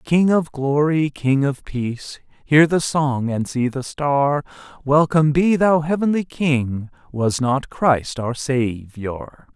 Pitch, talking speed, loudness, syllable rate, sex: 140 Hz, 145 wpm, -19 LUFS, 3.5 syllables/s, male